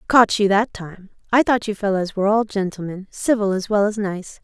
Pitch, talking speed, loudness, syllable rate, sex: 205 Hz, 215 wpm, -20 LUFS, 5.2 syllables/s, female